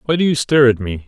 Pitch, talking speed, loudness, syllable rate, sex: 130 Hz, 335 wpm, -15 LUFS, 7.7 syllables/s, male